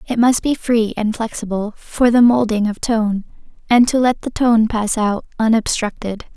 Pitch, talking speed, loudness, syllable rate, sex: 225 Hz, 180 wpm, -17 LUFS, 4.6 syllables/s, female